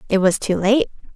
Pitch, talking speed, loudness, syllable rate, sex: 215 Hz, 205 wpm, -18 LUFS, 5.3 syllables/s, female